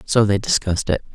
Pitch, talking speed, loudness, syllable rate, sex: 105 Hz, 210 wpm, -19 LUFS, 6.1 syllables/s, male